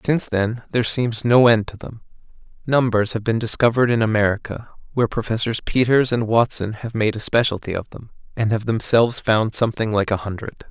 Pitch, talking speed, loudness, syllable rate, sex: 115 Hz, 185 wpm, -20 LUFS, 5.8 syllables/s, male